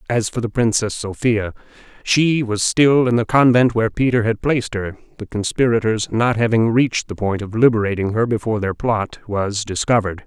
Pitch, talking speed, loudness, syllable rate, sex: 110 Hz, 180 wpm, -18 LUFS, 5.4 syllables/s, male